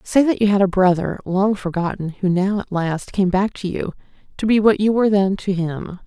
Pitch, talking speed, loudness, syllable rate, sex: 195 Hz, 235 wpm, -19 LUFS, 5.2 syllables/s, female